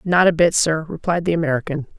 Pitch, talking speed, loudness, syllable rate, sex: 165 Hz, 210 wpm, -19 LUFS, 6.2 syllables/s, female